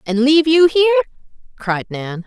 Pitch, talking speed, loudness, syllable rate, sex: 275 Hz, 160 wpm, -15 LUFS, 5.8 syllables/s, female